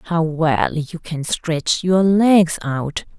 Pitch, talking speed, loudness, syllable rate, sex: 165 Hz, 150 wpm, -18 LUFS, 2.6 syllables/s, female